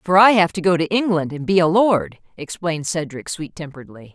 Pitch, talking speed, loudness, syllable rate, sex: 170 Hz, 215 wpm, -18 LUFS, 5.6 syllables/s, female